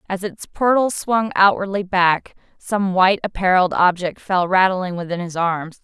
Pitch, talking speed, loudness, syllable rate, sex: 190 Hz, 155 wpm, -18 LUFS, 4.7 syllables/s, female